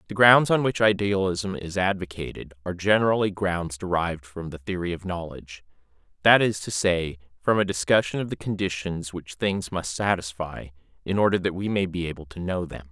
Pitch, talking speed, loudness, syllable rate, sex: 90 Hz, 185 wpm, -24 LUFS, 5.4 syllables/s, male